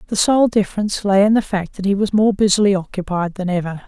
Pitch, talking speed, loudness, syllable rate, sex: 200 Hz, 230 wpm, -17 LUFS, 6.4 syllables/s, female